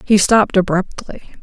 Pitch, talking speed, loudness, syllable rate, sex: 200 Hz, 125 wpm, -14 LUFS, 4.8 syllables/s, female